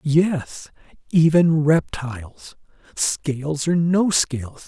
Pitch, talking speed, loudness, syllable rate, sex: 150 Hz, 90 wpm, -20 LUFS, 3.2 syllables/s, male